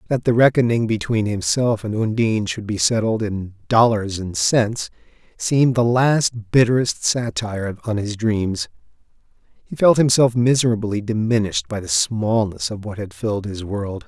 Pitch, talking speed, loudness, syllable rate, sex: 110 Hz, 155 wpm, -19 LUFS, 4.8 syllables/s, male